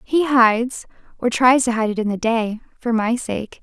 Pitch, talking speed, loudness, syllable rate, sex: 235 Hz, 215 wpm, -19 LUFS, 4.6 syllables/s, female